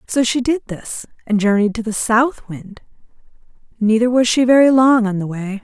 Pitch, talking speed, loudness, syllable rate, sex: 230 Hz, 190 wpm, -16 LUFS, 4.9 syllables/s, female